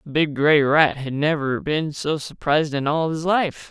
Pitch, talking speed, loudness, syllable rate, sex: 150 Hz, 210 wpm, -20 LUFS, 4.4 syllables/s, male